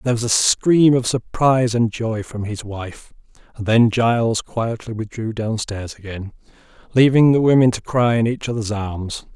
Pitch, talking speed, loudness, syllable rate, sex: 115 Hz, 175 wpm, -18 LUFS, 4.7 syllables/s, male